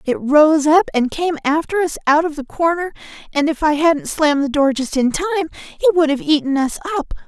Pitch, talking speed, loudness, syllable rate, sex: 305 Hz, 225 wpm, -17 LUFS, 5.6 syllables/s, female